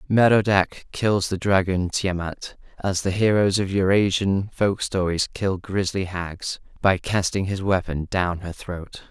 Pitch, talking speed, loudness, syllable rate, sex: 95 Hz, 150 wpm, -23 LUFS, 3.8 syllables/s, male